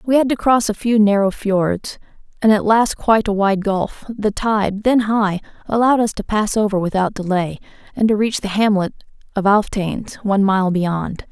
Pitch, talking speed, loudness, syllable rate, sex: 210 Hz, 190 wpm, -17 LUFS, 4.9 syllables/s, female